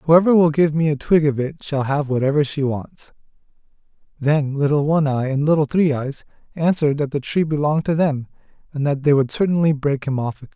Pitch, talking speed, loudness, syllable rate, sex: 145 Hz, 215 wpm, -19 LUFS, 5.8 syllables/s, male